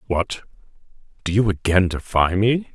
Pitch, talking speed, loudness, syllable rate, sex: 100 Hz, 130 wpm, -20 LUFS, 4.4 syllables/s, male